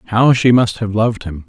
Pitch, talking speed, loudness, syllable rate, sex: 110 Hz, 245 wpm, -14 LUFS, 5.7 syllables/s, male